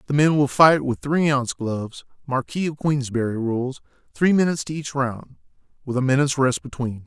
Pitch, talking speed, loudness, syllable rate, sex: 135 Hz, 180 wpm, -21 LUFS, 5.3 syllables/s, male